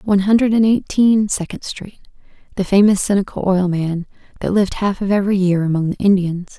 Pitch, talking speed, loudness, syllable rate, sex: 195 Hz, 175 wpm, -17 LUFS, 5.8 syllables/s, female